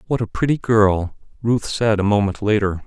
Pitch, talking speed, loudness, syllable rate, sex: 105 Hz, 190 wpm, -19 LUFS, 4.9 syllables/s, male